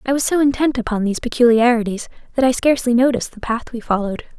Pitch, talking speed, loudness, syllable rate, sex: 240 Hz, 205 wpm, -18 LUFS, 7.2 syllables/s, female